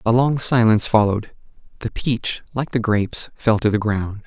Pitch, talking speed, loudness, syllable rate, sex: 115 Hz, 185 wpm, -20 LUFS, 5.1 syllables/s, male